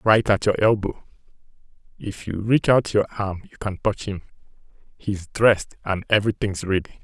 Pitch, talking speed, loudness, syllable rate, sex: 100 Hz, 160 wpm, -22 LUFS, 5.1 syllables/s, male